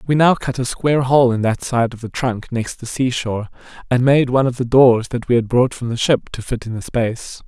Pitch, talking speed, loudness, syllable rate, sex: 125 Hz, 275 wpm, -18 LUFS, 5.5 syllables/s, male